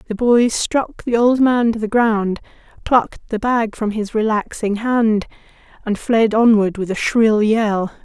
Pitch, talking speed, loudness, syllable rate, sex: 220 Hz, 170 wpm, -17 LUFS, 4.1 syllables/s, female